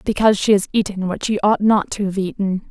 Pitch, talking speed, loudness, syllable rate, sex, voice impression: 200 Hz, 245 wpm, -18 LUFS, 5.9 syllables/s, female, feminine, slightly adult-like, slightly halting, cute, slightly calm, friendly, slightly kind